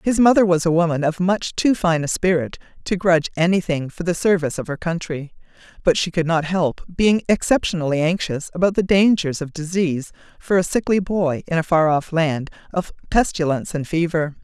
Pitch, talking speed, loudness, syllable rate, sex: 170 Hz, 190 wpm, -20 LUFS, 5.4 syllables/s, female